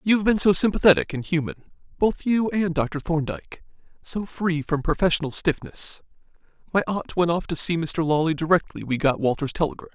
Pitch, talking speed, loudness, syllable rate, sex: 165 Hz, 170 wpm, -23 LUFS, 5.5 syllables/s, male